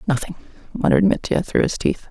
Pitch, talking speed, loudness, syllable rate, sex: 170 Hz, 170 wpm, -20 LUFS, 6.3 syllables/s, female